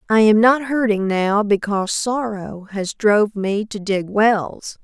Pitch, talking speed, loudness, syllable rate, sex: 210 Hz, 160 wpm, -18 LUFS, 4.0 syllables/s, female